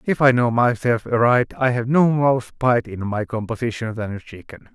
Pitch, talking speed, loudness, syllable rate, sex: 120 Hz, 200 wpm, -20 LUFS, 5.0 syllables/s, male